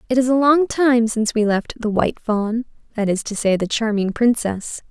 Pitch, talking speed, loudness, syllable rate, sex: 230 Hz, 220 wpm, -19 LUFS, 5.1 syllables/s, female